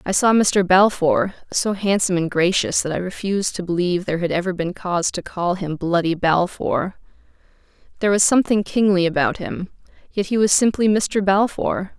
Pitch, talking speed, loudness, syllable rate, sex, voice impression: 185 Hz, 170 wpm, -19 LUFS, 5.3 syllables/s, female, very feminine, slightly adult-like, thin, tensed, powerful, bright, hard, very clear, very fluent, slightly raspy, cool, very intellectual, very refreshing, sincere, calm, very friendly, reassuring, unique, elegant, wild, sweet, lively, strict, slightly intense, slightly sharp